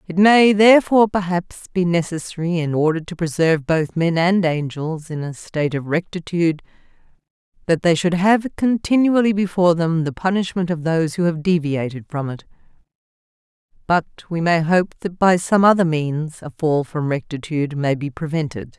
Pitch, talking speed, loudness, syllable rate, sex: 170 Hz, 165 wpm, -19 LUFS, 5.2 syllables/s, female